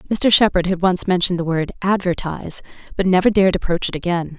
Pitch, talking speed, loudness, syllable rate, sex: 180 Hz, 190 wpm, -18 LUFS, 6.3 syllables/s, female